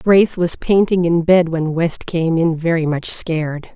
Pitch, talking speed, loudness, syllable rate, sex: 165 Hz, 190 wpm, -17 LUFS, 4.1 syllables/s, female